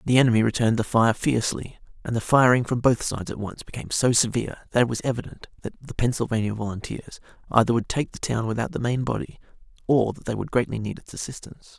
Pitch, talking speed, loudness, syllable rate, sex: 115 Hz, 210 wpm, -24 LUFS, 6.4 syllables/s, male